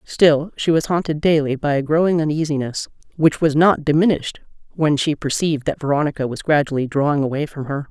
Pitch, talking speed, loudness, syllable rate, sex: 150 Hz, 180 wpm, -19 LUFS, 5.9 syllables/s, female